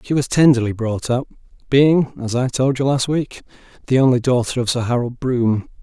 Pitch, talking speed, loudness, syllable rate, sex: 125 Hz, 195 wpm, -18 LUFS, 5.3 syllables/s, male